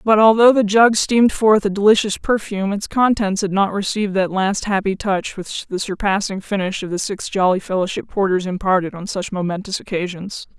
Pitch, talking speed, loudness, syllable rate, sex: 200 Hz, 185 wpm, -18 LUFS, 5.4 syllables/s, female